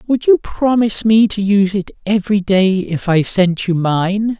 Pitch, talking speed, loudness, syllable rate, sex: 200 Hz, 190 wpm, -15 LUFS, 4.7 syllables/s, male